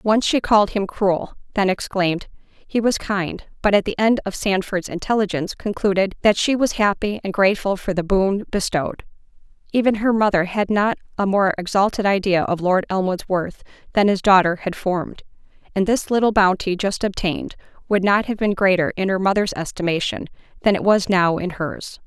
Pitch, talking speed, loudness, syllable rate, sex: 195 Hz, 180 wpm, -20 LUFS, 5.3 syllables/s, female